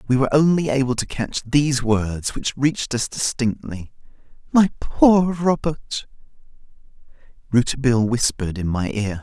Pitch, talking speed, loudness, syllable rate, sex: 130 Hz, 125 wpm, -20 LUFS, 5.0 syllables/s, male